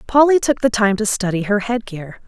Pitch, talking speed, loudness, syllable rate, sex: 220 Hz, 210 wpm, -17 LUFS, 5.2 syllables/s, female